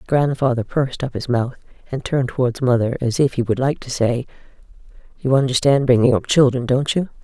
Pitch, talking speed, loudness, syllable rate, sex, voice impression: 130 Hz, 190 wpm, -19 LUFS, 5.8 syllables/s, female, feminine, adult-like, slightly hard, slightly muffled, fluent, intellectual, calm, elegant, slightly strict, slightly sharp